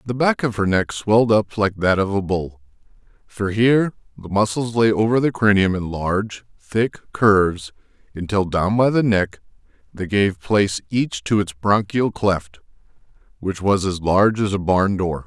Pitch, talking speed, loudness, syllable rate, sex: 100 Hz, 175 wpm, -19 LUFS, 4.6 syllables/s, male